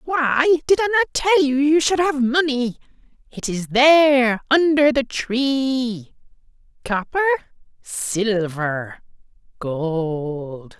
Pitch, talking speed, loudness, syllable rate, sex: 255 Hz, 105 wpm, -19 LUFS, 3.2 syllables/s, male